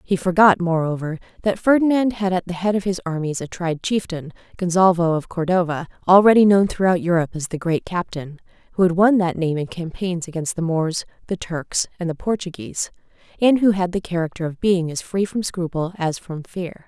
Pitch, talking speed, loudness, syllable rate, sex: 180 Hz, 195 wpm, -20 LUFS, 5.4 syllables/s, female